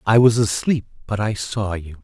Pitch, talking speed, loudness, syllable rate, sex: 105 Hz, 205 wpm, -20 LUFS, 4.8 syllables/s, male